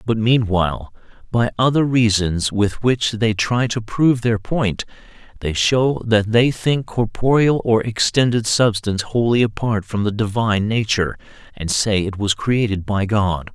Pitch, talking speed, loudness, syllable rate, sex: 110 Hz, 155 wpm, -18 LUFS, 4.4 syllables/s, male